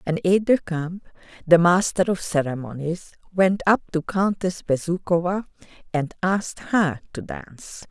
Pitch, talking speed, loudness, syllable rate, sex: 175 Hz, 135 wpm, -22 LUFS, 4.4 syllables/s, female